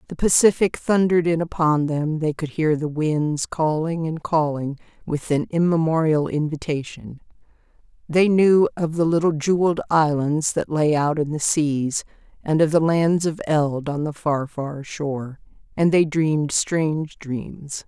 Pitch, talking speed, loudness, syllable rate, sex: 155 Hz, 160 wpm, -21 LUFS, 4.3 syllables/s, female